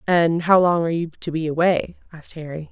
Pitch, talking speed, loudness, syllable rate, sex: 165 Hz, 220 wpm, -20 LUFS, 6.0 syllables/s, female